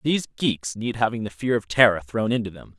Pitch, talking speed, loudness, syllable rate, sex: 115 Hz, 235 wpm, -23 LUFS, 5.6 syllables/s, male